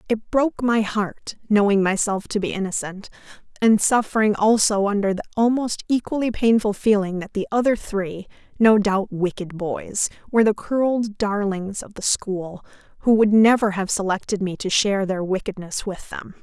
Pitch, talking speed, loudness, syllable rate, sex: 205 Hz, 155 wpm, -21 LUFS, 4.9 syllables/s, female